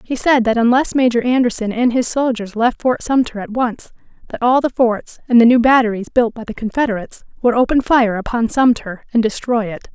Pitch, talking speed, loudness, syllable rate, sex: 235 Hz, 205 wpm, -16 LUFS, 5.5 syllables/s, female